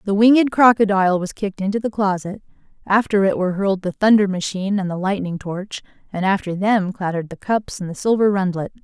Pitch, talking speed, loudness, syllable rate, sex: 195 Hz, 195 wpm, -19 LUFS, 6.1 syllables/s, female